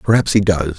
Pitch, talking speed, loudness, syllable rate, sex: 95 Hz, 230 wpm, -15 LUFS, 5.9 syllables/s, male